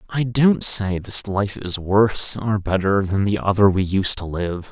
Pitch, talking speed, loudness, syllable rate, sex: 100 Hz, 205 wpm, -19 LUFS, 4.3 syllables/s, male